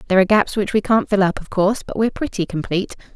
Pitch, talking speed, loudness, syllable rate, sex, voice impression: 200 Hz, 265 wpm, -19 LUFS, 7.8 syllables/s, female, feminine, slightly gender-neutral, slightly old, thin, slightly relaxed, powerful, very bright, hard, very clear, very fluent, slightly raspy, cool, intellectual, refreshing, slightly sincere, slightly calm, slightly friendly, slightly reassuring, slightly unique, slightly elegant, slightly wild, very lively, strict, very intense, very sharp